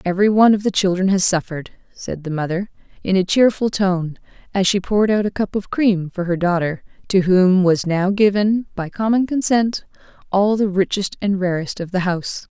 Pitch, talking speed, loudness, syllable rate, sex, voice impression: 190 Hz, 195 wpm, -18 LUFS, 5.3 syllables/s, female, very feminine, very adult-like, intellectual, slightly calm